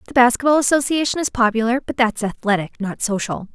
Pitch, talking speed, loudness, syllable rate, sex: 235 Hz, 185 wpm, -19 LUFS, 6.4 syllables/s, female